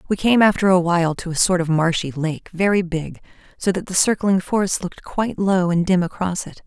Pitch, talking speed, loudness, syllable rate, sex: 180 Hz, 225 wpm, -19 LUFS, 5.6 syllables/s, female